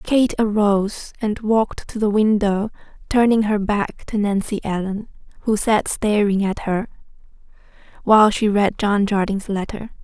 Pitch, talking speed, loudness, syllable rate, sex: 210 Hz, 145 wpm, -19 LUFS, 4.7 syllables/s, female